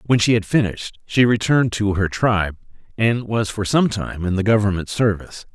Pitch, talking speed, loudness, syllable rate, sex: 105 Hz, 195 wpm, -19 LUFS, 5.5 syllables/s, male